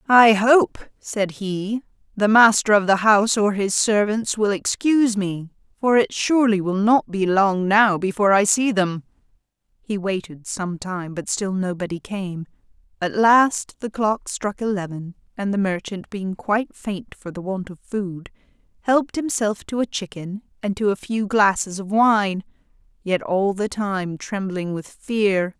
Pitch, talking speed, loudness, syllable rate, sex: 200 Hz, 165 wpm, -21 LUFS, 4.2 syllables/s, female